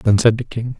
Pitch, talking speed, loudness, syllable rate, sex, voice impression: 115 Hz, 300 wpm, -18 LUFS, 5.3 syllables/s, male, very masculine, slightly old, relaxed, weak, dark, very soft, muffled, fluent, cool, intellectual, sincere, very calm, very mature, very friendly, reassuring, unique, elegant, slightly wild, sweet, slightly lively, kind, slightly modest